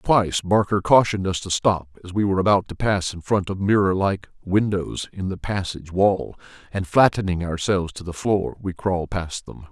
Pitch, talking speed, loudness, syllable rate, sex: 95 Hz, 200 wpm, -22 LUFS, 5.3 syllables/s, male